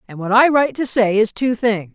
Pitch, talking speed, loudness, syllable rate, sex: 225 Hz, 275 wpm, -16 LUFS, 5.6 syllables/s, female